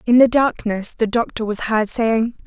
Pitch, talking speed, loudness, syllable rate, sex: 225 Hz, 195 wpm, -18 LUFS, 4.5 syllables/s, female